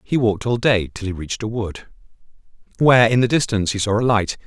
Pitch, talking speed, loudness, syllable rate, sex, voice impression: 110 Hz, 230 wpm, -19 LUFS, 6.5 syllables/s, male, masculine, middle-aged, tensed, powerful, clear, slightly fluent, cool, intellectual, mature, wild, lively, slightly intense